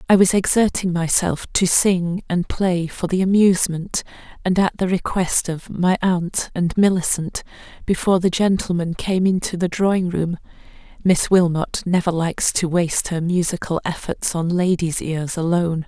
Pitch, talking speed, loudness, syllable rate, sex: 180 Hz, 155 wpm, -19 LUFS, 3.3 syllables/s, female